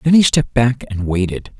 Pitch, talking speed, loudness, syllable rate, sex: 120 Hz, 225 wpm, -16 LUFS, 5.5 syllables/s, male